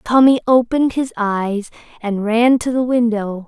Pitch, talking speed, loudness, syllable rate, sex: 230 Hz, 155 wpm, -16 LUFS, 4.4 syllables/s, female